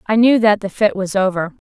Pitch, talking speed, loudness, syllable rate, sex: 205 Hz, 250 wpm, -16 LUFS, 5.5 syllables/s, female